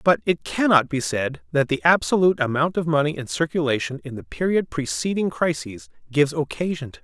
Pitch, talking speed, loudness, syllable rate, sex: 150 Hz, 190 wpm, -22 LUFS, 5.9 syllables/s, male